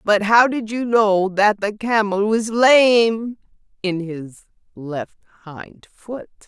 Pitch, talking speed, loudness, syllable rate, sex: 210 Hz, 140 wpm, -17 LUFS, 3.2 syllables/s, female